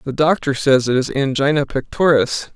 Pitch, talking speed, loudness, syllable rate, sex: 140 Hz, 165 wpm, -17 LUFS, 5.0 syllables/s, male